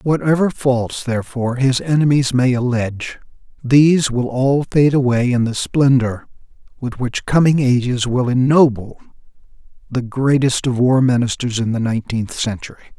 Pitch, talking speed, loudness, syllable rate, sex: 125 Hz, 140 wpm, -16 LUFS, 4.9 syllables/s, male